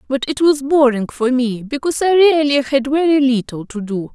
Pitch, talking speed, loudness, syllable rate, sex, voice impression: 265 Hz, 205 wpm, -16 LUFS, 5.0 syllables/s, female, feminine, adult-like, clear, fluent, slightly intellectual, slightly friendly, lively